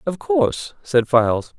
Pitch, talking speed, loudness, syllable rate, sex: 140 Hz, 150 wpm, -19 LUFS, 4.4 syllables/s, male